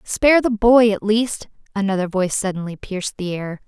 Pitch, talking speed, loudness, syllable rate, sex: 205 Hz, 180 wpm, -19 LUFS, 5.5 syllables/s, female